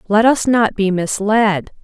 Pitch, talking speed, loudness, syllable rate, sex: 210 Hz, 165 wpm, -15 LUFS, 3.8 syllables/s, female